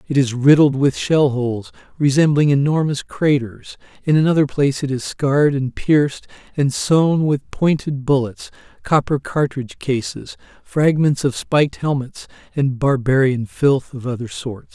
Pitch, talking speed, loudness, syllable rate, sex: 140 Hz, 140 wpm, -18 LUFS, 4.5 syllables/s, male